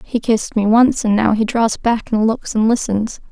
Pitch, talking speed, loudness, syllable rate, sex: 225 Hz, 235 wpm, -16 LUFS, 4.8 syllables/s, female